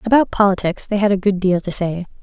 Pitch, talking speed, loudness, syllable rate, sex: 195 Hz, 245 wpm, -17 LUFS, 6.0 syllables/s, female